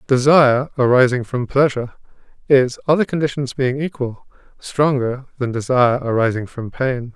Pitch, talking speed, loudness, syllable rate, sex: 130 Hz, 125 wpm, -18 LUFS, 5.1 syllables/s, male